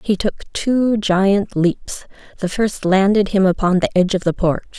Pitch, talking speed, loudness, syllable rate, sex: 195 Hz, 190 wpm, -17 LUFS, 4.6 syllables/s, female